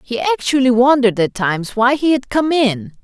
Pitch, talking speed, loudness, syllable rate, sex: 245 Hz, 200 wpm, -15 LUFS, 5.3 syllables/s, female